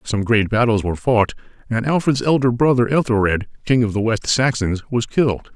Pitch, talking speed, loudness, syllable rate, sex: 115 Hz, 185 wpm, -18 LUFS, 5.4 syllables/s, male